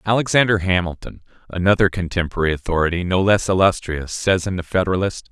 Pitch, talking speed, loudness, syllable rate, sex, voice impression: 95 Hz, 115 wpm, -19 LUFS, 6.3 syllables/s, male, very masculine, very adult-like, middle-aged, very thick, very tensed, very powerful, bright, slightly soft, slightly muffled, fluent, very cool, very intellectual, slightly refreshing, very sincere, very calm, very mature, friendly, reassuring, elegant, lively, kind